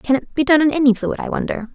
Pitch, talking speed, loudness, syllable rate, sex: 275 Hz, 310 wpm, -17 LUFS, 6.4 syllables/s, female